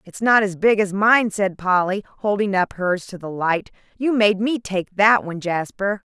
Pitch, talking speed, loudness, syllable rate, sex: 200 Hz, 205 wpm, -20 LUFS, 4.6 syllables/s, female